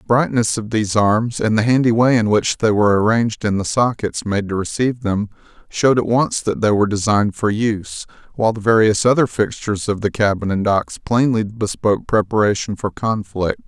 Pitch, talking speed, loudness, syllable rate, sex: 110 Hz, 195 wpm, -17 LUFS, 5.6 syllables/s, male